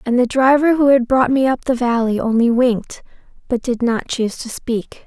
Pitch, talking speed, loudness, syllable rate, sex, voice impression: 245 Hz, 215 wpm, -17 LUFS, 5.1 syllables/s, female, very feminine, very young, very thin, slightly tensed, slightly weak, very bright, very soft, very clear, very fluent, slightly raspy, very cute, intellectual, very refreshing, sincere, very calm, very friendly, very reassuring, very unique, very elegant, very sweet, slightly lively, very kind, slightly intense, slightly sharp, modest, very light